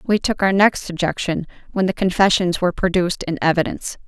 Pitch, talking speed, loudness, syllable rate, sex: 180 Hz, 175 wpm, -19 LUFS, 6.0 syllables/s, female